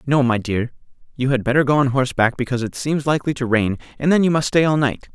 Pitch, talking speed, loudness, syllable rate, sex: 135 Hz, 255 wpm, -19 LUFS, 6.6 syllables/s, male